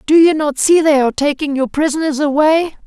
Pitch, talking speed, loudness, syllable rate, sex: 300 Hz, 210 wpm, -14 LUFS, 5.6 syllables/s, female